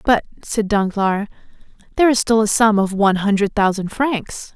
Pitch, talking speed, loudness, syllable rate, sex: 210 Hz, 170 wpm, -17 LUFS, 5.1 syllables/s, female